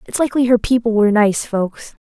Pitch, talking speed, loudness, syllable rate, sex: 225 Hz, 205 wpm, -16 LUFS, 6.0 syllables/s, female